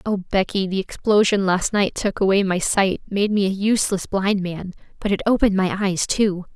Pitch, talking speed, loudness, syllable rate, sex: 195 Hz, 200 wpm, -20 LUFS, 5.1 syllables/s, female